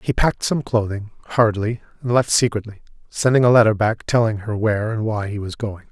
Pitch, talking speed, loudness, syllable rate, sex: 110 Hz, 205 wpm, -19 LUFS, 5.9 syllables/s, male